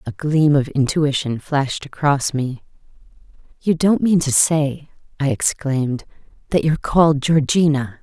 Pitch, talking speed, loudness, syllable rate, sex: 145 Hz, 135 wpm, -18 LUFS, 4.5 syllables/s, female